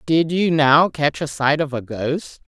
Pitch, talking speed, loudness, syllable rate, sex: 150 Hz, 210 wpm, -19 LUFS, 3.9 syllables/s, female